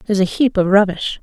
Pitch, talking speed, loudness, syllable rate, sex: 200 Hz, 245 wpm, -16 LUFS, 6.5 syllables/s, female